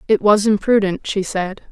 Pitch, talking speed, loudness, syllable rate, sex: 200 Hz, 175 wpm, -17 LUFS, 4.5 syllables/s, female